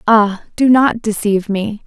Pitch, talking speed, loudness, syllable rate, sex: 215 Hz, 160 wpm, -15 LUFS, 4.3 syllables/s, female